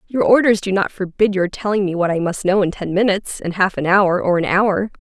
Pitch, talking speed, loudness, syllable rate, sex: 190 Hz, 260 wpm, -17 LUFS, 5.6 syllables/s, female